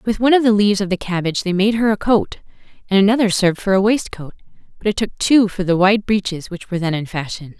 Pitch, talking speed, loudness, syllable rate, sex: 200 Hz, 255 wpm, -17 LUFS, 6.7 syllables/s, female